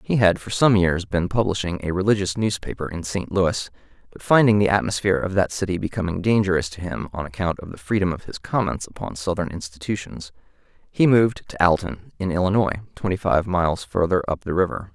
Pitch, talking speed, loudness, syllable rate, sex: 95 Hz, 195 wpm, -22 LUFS, 5.9 syllables/s, male